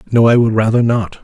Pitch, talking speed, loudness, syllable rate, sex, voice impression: 115 Hz, 245 wpm, -13 LUFS, 6.1 syllables/s, male, very masculine, middle-aged, thick, cool, wild